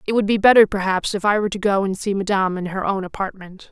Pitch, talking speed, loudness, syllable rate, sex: 200 Hz, 275 wpm, -19 LUFS, 6.8 syllables/s, female